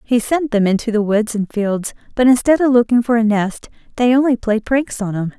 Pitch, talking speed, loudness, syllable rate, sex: 230 Hz, 235 wpm, -16 LUFS, 5.2 syllables/s, female